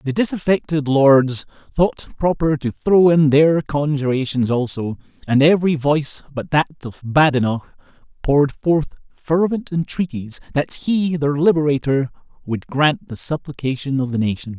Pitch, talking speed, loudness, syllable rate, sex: 145 Hz, 135 wpm, -18 LUFS, 4.6 syllables/s, male